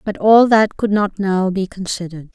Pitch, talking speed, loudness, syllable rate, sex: 195 Hz, 205 wpm, -16 LUFS, 4.9 syllables/s, female